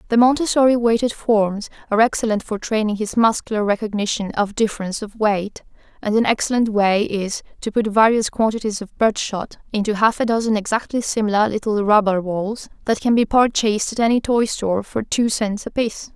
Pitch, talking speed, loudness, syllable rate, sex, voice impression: 215 Hz, 175 wpm, -19 LUFS, 5.6 syllables/s, female, feminine, slightly gender-neutral, adult-like, tensed, powerful, slightly bright, slightly clear, fluent, raspy, slightly intellectual, slightly friendly, elegant, lively, sharp